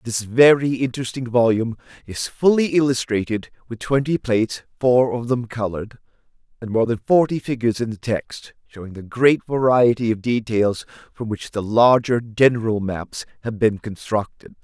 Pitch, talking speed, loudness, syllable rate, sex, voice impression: 120 Hz, 150 wpm, -20 LUFS, 5.0 syllables/s, male, masculine, adult-like, tensed, powerful, bright, clear, slightly halting, friendly, unique, slightly wild, lively, intense, light